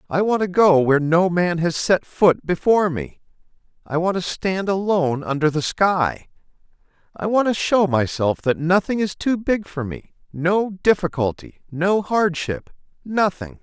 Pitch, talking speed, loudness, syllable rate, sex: 175 Hz, 155 wpm, -20 LUFS, 4.4 syllables/s, male